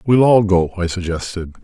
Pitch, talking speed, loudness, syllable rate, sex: 95 Hz, 185 wpm, -16 LUFS, 5.1 syllables/s, male